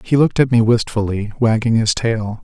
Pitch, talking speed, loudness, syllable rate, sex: 115 Hz, 195 wpm, -16 LUFS, 5.3 syllables/s, male